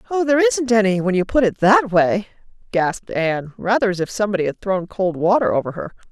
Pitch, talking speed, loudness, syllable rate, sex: 200 Hz, 215 wpm, -18 LUFS, 6.1 syllables/s, female